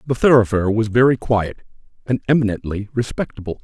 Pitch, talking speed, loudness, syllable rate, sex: 110 Hz, 130 wpm, -18 LUFS, 5.9 syllables/s, male